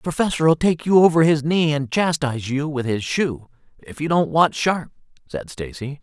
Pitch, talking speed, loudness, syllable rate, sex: 150 Hz, 200 wpm, -19 LUFS, 4.9 syllables/s, male